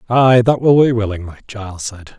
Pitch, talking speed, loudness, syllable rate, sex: 110 Hz, 190 wpm, -14 LUFS, 5.5 syllables/s, male